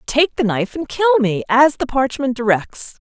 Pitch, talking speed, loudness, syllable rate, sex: 255 Hz, 195 wpm, -17 LUFS, 4.6 syllables/s, female